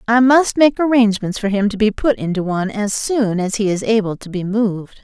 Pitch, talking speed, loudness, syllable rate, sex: 215 Hz, 240 wpm, -17 LUFS, 5.6 syllables/s, female